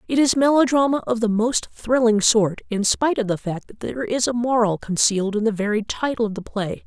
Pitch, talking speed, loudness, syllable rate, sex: 225 Hz, 225 wpm, -20 LUFS, 5.6 syllables/s, female